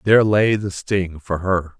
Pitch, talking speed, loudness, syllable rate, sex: 95 Hz, 200 wpm, -19 LUFS, 4.2 syllables/s, male